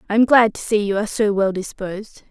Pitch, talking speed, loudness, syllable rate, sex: 210 Hz, 260 wpm, -18 LUFS, 6.3 syllables/s, female